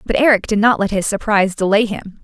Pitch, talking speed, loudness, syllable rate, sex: 205 Hz, 240 wpm, -16 LUFS, 6.1 syllables/s, female